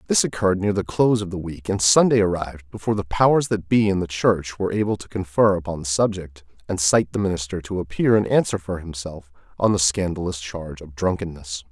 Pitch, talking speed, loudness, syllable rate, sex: 90 Hz, 215 wpm, -21 LUFS, 6.0 syllables/s, male